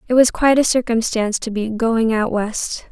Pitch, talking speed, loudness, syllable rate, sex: 230 Hz, 205 wpm, -18 LUFS, 5.2 syllables/s, female